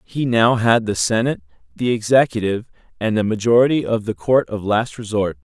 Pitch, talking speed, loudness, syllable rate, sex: 115 Hz, 175 wpm, -18 LUFS, 5.6 syllables/s, male